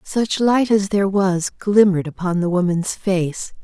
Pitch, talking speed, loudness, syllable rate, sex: 190 Hz, 165 wpm, -18 LUFS, 4.4 syllables/s, female